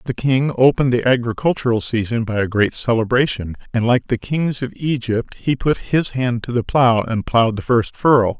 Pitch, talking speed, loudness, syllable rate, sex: 120 Hz, 200 wpm, -18 LUFS, 5.2 syllables/s, male